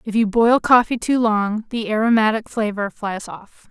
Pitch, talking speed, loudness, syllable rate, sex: 220 Hz, 180 wpm, -18 LUFS, 4.5 syllables/s, female